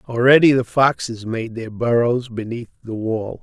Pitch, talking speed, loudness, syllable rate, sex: 120 Hz, 160 wpm, -18 LUFS, 4.5 syllables/s, male